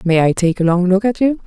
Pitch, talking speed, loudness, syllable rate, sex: 195 Hz, 325 wpm, -15 LUFS, 6.0 syllables/s, female